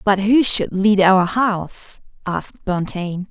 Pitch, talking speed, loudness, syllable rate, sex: 195 Hz, 145 wpm, -18 LUFS, 3.7 syllables/s, female